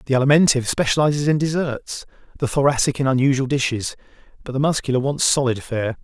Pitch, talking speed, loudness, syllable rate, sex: 135 Hz, 160 wpm, -19 LUFS, 6.4 syllables/s, male